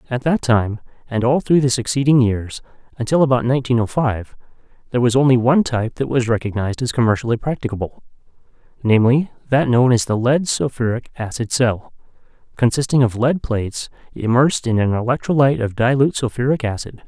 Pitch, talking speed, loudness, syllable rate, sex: 120 Hz, 160 wpm, -18 LUFS, 6.1 syllables/s, male